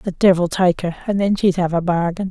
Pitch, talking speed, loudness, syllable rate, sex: 180 Hz, 260 wpm, -18 LUFS, 5.9 syllables/s, female